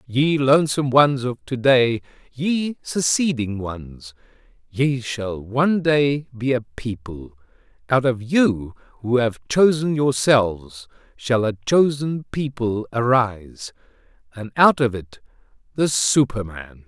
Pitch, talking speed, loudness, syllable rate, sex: 125 Hz, 115 wpm, -20 LUFS, 3.7 syllables/s, male